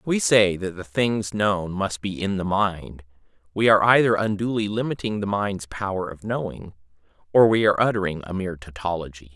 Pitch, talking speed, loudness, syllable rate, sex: 100 Hz, 185 wpm, -22 LUFS, 5.4 syllables/s, male